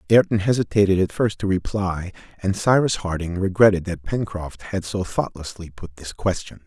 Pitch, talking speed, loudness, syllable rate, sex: 95 Hz, 160 wpm, -22 LUFS, 5.1 syllables/s, male